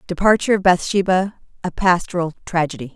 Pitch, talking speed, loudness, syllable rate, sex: 180 Hz, 100 wpm, -18 LUFS, 6.2 syllables/s, female